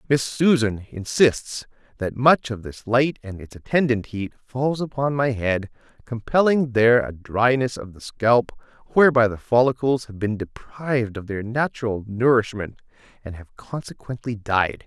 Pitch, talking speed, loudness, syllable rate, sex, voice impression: 120 Hz, 150 wpm, -21 LUFS, 4.5 syllables/s, male, very masculine, very adult-like, middle-aged, thick, slightly tensed, powerful, bright, soft, slightly clear, fluent, cool, very intellectual, refreshing, very sincere, very calm, mature, very friendly, very reassuring, unique, very elegant, slightly wild, sweet, very lively, kind, slightly light